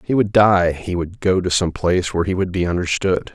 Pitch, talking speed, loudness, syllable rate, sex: 90 Hz, 250 wpm, -18 LUFS, 5.6 syllables/s, male